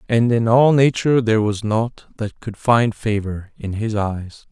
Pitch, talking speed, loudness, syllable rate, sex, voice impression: 110 Hz, 185 wpm, -19 LUFS, 4.4 syllables/s, male, very masculine, very middle-aged, very thick, slightly relaxed, slightly weak, dark, very soft, slightly muffled, fluent, slightly raspy, cool, intellectual, refreshing, slightly sincere, calm, mature, very friendly, very reassuring, unique, elegant, slightly wild, sweet, lively, kind, modest